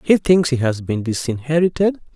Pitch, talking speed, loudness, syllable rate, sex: 145 Hz, 165 wpm, -18 LUFS, 5.2 syllables/s, male